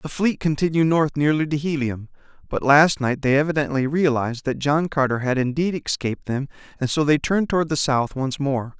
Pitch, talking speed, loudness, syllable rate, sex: 145 Hz, 200 wpm, -21 LUFS, 5.5 syllables/s, male